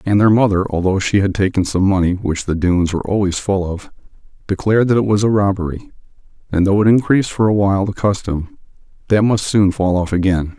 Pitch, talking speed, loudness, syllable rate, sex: 100 Hz, 210 wpm, -16 LUFS, 4.2 syllables/s, male